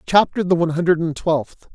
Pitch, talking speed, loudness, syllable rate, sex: 170 Hz, 205 wpm, -19 LUFS, 5.8 syllables/s, male